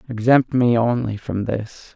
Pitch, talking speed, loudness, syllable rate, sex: 115 Hz, 155 wpm, -19 LUFS, 4.0 syllables/s, male